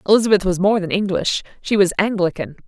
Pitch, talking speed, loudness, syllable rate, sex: 190 Hz, 155 wpm, -18 LUFS, 6.3 syllables/s, female